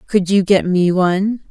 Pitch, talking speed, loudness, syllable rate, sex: 190 Hz, 200 wpm, -15 LUFS, 4.6 syllables/s, female